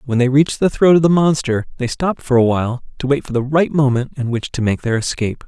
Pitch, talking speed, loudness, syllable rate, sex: 135 Hz, 275 wpm, -17 LUFS, 6.3 syllables/s, male